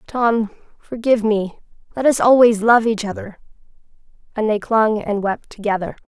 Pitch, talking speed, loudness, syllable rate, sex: 220 Hz, 140 wpm, -17 LUFS, 4.9 syllables/s, female